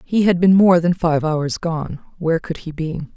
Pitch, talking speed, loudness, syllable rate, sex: 165 Hz, 230 wpm, -18 LUFS, 4.6 syllables/s, female